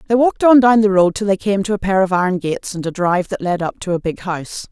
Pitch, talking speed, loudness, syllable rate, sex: 195 Hz, 320 wpm, -16 LUFS, 6.6 syllables/s, female